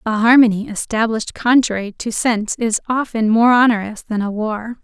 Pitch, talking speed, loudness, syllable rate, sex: 225 Hz, 160 wpm, -16 LUFS, 5.3 syllables/s, female